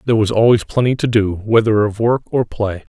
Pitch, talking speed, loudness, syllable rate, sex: 110 Hz, 225 wpm, -16 LUFS, 5.6 syllables/s, male